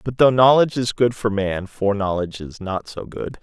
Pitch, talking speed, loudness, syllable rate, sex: 110 Hz, 210 wpm, -19 LUFS, 5.6 syllables/s, male